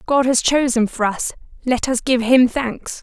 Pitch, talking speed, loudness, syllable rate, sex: 250 Hz, 200 wpm, -18 LUFS, 4.3 syllables/s, female